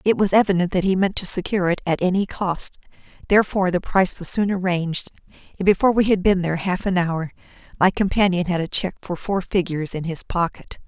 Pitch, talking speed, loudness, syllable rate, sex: 185 Hz, 210 wpm, -20 LUFS, 6.3 syllables/s, female